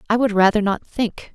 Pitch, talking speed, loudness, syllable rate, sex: 210 Hz, 225 wpm, -19 LUFS, 5.2 syllables/s, female